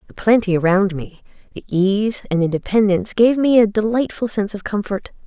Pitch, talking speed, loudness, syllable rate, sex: 205 Hz, 170 wpm, -18 LUFS, 5.5 syllables/s, female